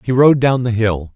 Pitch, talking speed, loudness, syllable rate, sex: 115 Hz, 260 wpm, -14 LUFS, 4.8 syllables/s, male